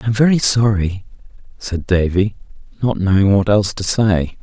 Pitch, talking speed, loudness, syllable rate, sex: 100 Hz, 150 wpm, -16 LUFS, 4.9 syllables/s, male